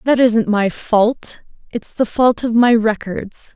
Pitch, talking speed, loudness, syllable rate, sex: 225 Hz, 170 wpm, -16 LUFS, 3.5 syllables/s, female